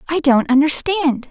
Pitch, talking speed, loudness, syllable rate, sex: 295 Hz, 140 wpm, -16 LUFS, 4.6 syllables/s, female